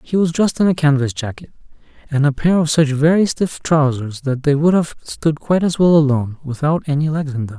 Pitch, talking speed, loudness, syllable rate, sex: 150 Hz, 230 wpm, -17 LUFS, 5.8 syllables/s, male